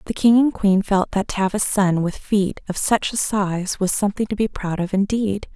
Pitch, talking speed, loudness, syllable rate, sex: 200 Hz, 250 wpm, -20 LUFS, 4.9 syllables/s, female